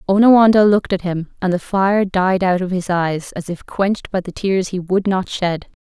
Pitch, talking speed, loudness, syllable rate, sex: 185 Hz, 225 wpm, -17 LUFS, 5.0 syllables/s, female